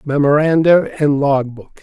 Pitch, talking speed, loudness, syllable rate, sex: 145 Hz, 130 wpm, -14 LUFS, 4.5 syllables/s, male